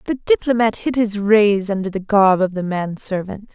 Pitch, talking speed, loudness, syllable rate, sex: 205 Hz, 205 wpm, -18 LUFS, 4.8 syllables/s, female